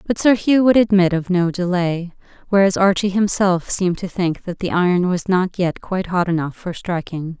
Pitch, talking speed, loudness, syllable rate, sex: 185 Hz, 205 wpm, -18 LUFS, 5.1 syllables/s, female